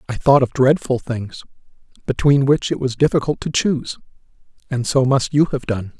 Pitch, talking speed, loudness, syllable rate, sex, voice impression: 135 Hz, 180 wpm, -18 LUFS, 5.2 syllables/s, male, masculine, middle-aged, slightly muffled, slightly fluent, slightly calm, friendly, slightly reassuring, slightly kind